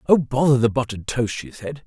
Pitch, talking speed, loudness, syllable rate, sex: 125 Hz, 225 wpm, -21 LUFS, 5.8 syllables/s, male